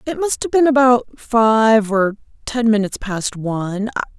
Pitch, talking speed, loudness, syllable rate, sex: 230 Hz, 160 wpm, -17 LUFS, 4.3 syllables/s, female